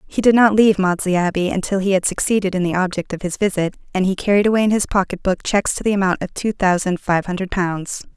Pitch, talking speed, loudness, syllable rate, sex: 190 Hz, 250 wpm, -18 LUFS, 6.6 syllables/s, female